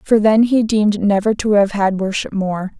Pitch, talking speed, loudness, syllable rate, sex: 205 Hz, 215 wpm, -16 LUFS, 4.8 syllables/s, female